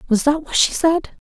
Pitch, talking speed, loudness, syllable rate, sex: 290 Hz, 235 wpm, -18 LUFS, 5.0 syllables/s, female